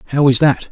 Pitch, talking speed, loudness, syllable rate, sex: 135 Hz, 255 wpm, -13 LUFS, 6.7 syllables/s, male